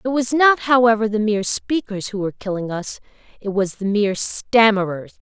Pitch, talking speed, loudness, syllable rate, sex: 215 Hz, 170 wpm, -19 LUFS, 5.4 syllables/s, female